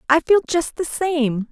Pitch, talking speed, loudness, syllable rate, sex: 305 Hz, 200 wpm, -19 LUFS, 4.0 syllables/s, female